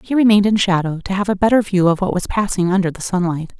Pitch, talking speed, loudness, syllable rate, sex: 190 Hz, 265 wpm, -17 LUFS, 6.7 syllables/s, female